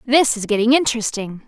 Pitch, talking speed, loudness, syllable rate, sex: 230 Hz, 165 wpm, -17 LUFS, 6.1 syllables/s, female